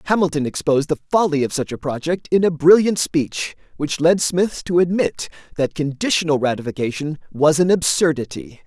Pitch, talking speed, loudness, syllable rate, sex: 160 Hz, 160 wpm, -19 LUFS, 5.4 syllables/s, male